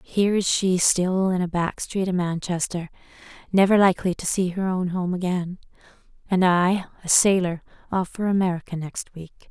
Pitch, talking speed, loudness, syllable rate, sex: 180 Hz, 170 wpm, -22 LUFS, 5.0 syllables/s, female